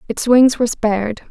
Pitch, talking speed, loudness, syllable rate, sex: 235 Hz, 185 wpm, -15 LUFS, 5.4 syllables/s, female